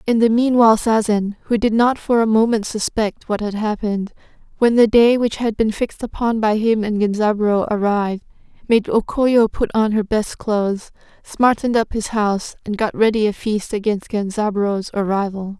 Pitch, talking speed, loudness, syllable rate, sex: 215 Hz, 180 wpm, -18 LUFS, 5.1 syllables/s, female